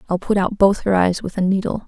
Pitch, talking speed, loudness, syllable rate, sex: 195 Hz, 285 wpm, -18 LUFS, 5.9 syllables/s, female